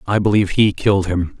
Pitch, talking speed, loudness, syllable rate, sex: 100 Hz, 215 wpm, -16 LUFS, 6.4 syllables/s, male